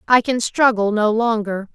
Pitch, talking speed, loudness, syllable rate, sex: 225 Hz, 170 wpm, -18 LUFS, 4.5 syllables/s, female